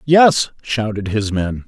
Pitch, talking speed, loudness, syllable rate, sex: 115 Hz, 145 wpm, -17 LUFS, 3.5 syllables/s, male